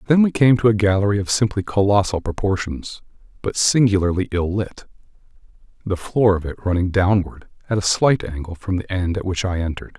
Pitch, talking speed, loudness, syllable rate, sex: 100 Hz, 185 wpm, -19 LUFS, 5.6 syllables/s, male